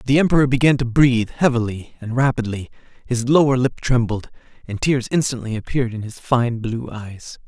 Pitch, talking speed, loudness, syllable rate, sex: 120 Hz, 170 wpm, -19 LUFS, 5.4 syllables/s, male